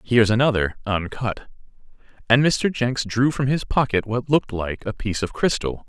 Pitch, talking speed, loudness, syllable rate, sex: 120 Hz, 175 wpm, -21 LUFS, 5.1 syllables/s, male